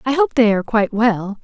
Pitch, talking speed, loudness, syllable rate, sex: 230 Hz, 250 wpm, -16 LUFS, 6.1 syllables/s, female